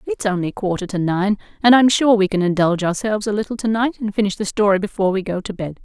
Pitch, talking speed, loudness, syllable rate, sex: 205 Hz, 255 wpm, -18 LUFS, 6.6 syllables/s, female